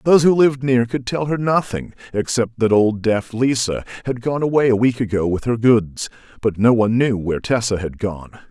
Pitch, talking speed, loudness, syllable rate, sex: 120 Hz, 210 wpm, -18 LUFS, 5.4 syllables/s, male